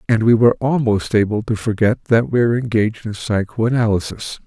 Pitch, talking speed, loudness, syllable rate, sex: 110 Hz, 175 wpm, -17 LUFS, 5.7 syllables/s, male